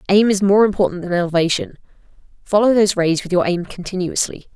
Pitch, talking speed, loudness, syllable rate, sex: 185 Hz, 170 wpm, -17 LUFS, 6.3 syllables/s, female